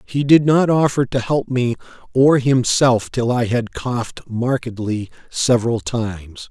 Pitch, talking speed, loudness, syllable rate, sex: 125 Hz, 150 wpm, -18 LUFS, 4.1 syllables/s, male